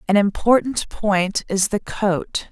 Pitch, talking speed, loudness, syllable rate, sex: 205 Hz, 145 wpm, -20 LUFS, 3.5 syllables/s, female